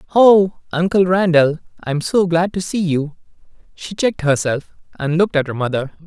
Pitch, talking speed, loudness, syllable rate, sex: 170 Hz, 170 wpm, -17 LUFS, 5.1 syllables/s, male